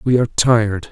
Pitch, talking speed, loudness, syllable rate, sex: 110 Hz, 195 wpm, -15 LUFS, 6.2 syllables/s, male